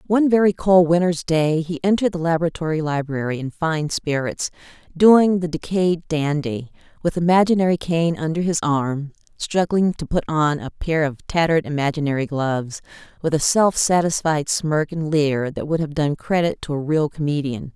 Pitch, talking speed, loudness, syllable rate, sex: 160 Hz, 165 wpm, -20 LUFS, 5.1 syllables/s, female